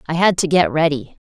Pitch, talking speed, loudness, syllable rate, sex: 160 Hz, 235 wpm, -16 LUFS, 5.8 syllables/s, female